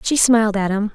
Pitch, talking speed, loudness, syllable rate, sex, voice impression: 215 Hz, 255 wpm, -17 LUFS, 6.0 syllables/s, female, feminine, slightly adult-like, slightly soft, slightly cute, sincere, slightly calm, friendly, kind